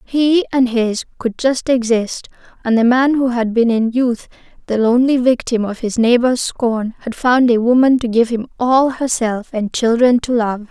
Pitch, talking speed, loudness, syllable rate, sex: 240 Hz, 190 wpm, -15 LUFS, 4.5 syllables/s, female